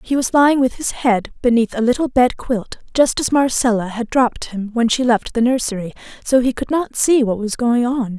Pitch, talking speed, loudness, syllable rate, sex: 240 Hz, 225 wpm, -17 LUFS, 5.2 syllables/s, female